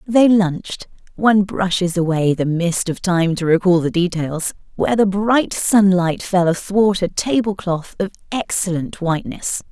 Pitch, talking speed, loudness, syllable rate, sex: 185 Hz, 150 wpm, -18 LUFS, 3.0 syllables/s, female